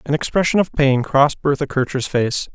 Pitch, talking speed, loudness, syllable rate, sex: 140 Hz, 190 wpm, -18 LUFS, 5.4 syllables/s, male